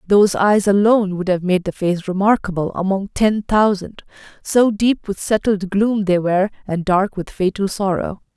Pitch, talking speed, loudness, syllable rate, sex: 195 Hz, 170 wpm, -18 LUFS, 4.8 syllables/s, female